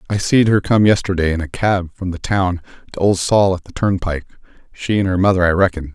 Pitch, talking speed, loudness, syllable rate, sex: 95 Hz, 220 wpm, -17 LUFS, 5.8 syllables/s, male